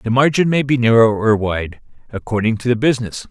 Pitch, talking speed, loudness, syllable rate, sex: 120 Hz, 200 wpm, -16 LUFS, 5.7 syllables/s, male